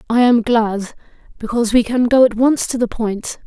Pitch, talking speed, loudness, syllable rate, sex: 230 Hz, 210 wpm, -16 LUFS, 5.3 syllables/s, female